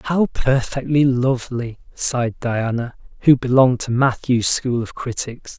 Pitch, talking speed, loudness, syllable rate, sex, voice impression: 125 Hz, 130 wpm, -19 LUFS, 4.5 syllables/s, male, masculine, adult-like, slightly soft, sincere, slightly friendly, reassuring, slightly kind